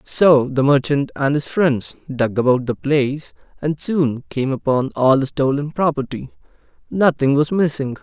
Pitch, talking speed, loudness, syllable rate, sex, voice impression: 140 Hz, 155 wpm, -18 LUFS, 4.5 syllables/s, male, masculine, slightly young, tensed, slightly powerful, bright, soft, slightly muffled, cool, slightly refreshing, friendly, reassuring, lively, slightly kind